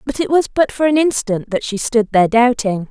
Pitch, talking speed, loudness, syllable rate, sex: 240 Hz, 250 wpm, -16 LUFS, 5.4 syllables/s, female